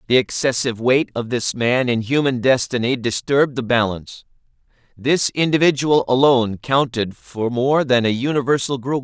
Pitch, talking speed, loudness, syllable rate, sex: 125 Hz, 145 wpm, -18 LUFS, 5.0 syllables/s, male